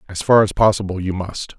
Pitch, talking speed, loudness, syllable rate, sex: 100 Hz, 225 wpm, -18 LUFS, 5.7 syllables/s, male